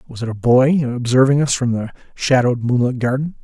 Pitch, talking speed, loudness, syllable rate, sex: 125 Hz, 190 wpm, -17 LUFS, 5.6 syllables/s, male